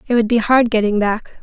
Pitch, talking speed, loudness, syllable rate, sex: 225 Hz, 250 wpm, -16 LUFS, 5.6 syllables/s, female